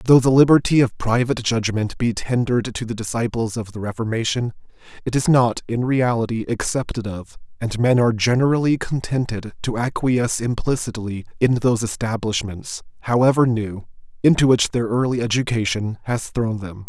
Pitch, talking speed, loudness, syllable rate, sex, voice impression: 115 Hz, 150 wpm, -20 LUFS, 5.3 syllables/s, male, masculine, adult-like, slightly muffled, refreshing, slightly sincere, slightly sweet